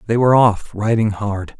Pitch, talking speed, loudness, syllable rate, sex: 110 Hz, 190 wpm, -16 LUFS, 4.9 syllables/s, male